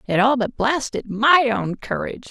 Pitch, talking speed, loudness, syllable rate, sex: 220 Hz, 180 wpm, -20 LUFS, 4.8 syllables/s, male